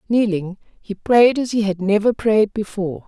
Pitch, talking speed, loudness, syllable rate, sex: 205 Hz, 175 wpm, -18 LUFS, 4.7 syllables/s, female